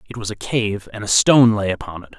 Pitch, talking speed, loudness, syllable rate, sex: 105 Hz, 275 wpm, -18 LUFS, 6.1 syllables/s, male